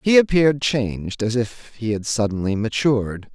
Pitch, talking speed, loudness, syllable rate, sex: 120 Hz, 160 wpm, -21 LUFS, 5.0 syllables/s, male